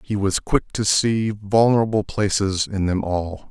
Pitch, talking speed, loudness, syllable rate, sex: 100 Hz, 170 wpm, -20 LUFS, 4.1 syllables/s, male